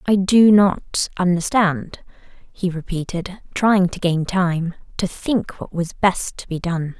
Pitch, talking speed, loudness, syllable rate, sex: 180 Hz, 155 wpm, -19 LUFS, 3.6 syllables/s, female